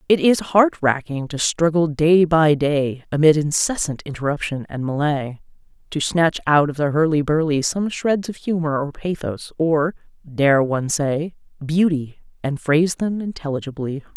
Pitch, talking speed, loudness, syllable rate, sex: 155 Hz, 155 wpm, -20 LUFS, 4.5 syllables/s, female